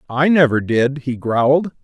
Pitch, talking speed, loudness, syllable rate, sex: 135 Hz, 165 wpm, -16 LUFS, 4.4 syllables/s, male